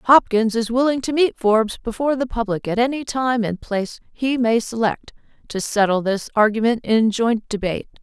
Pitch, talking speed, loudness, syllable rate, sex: 230 Hz, 180 wpm, -20 LUFS, 5.2 syllables/s, female